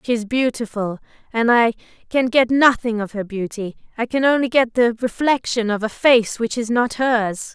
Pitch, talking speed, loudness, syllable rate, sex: 235 Hz, 185 wpm, -19 LUFS, 4.6 syllables/s, female